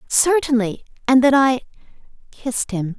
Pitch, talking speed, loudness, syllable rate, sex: 255 Hz, 100 wpm, -18 LUFS, 4.7 syllables/s, female